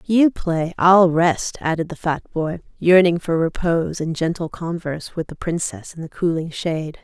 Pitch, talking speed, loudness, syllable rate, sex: 170 Hz, 180 wpm, -20 LUFS, 4.7 syllables/s, female